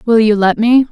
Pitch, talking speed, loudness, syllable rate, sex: 225 Hz, 260 wpm, -11 LUFS, 5.1 syllables/s, female